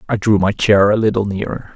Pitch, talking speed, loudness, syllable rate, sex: 100 Hz, 240 wpm, -15 LUFS, 5.8 syllables/s, male